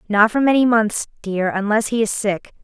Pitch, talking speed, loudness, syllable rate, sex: 220 Hz, 205 wpm, -18 LUFS, 4.9 syllables/s, female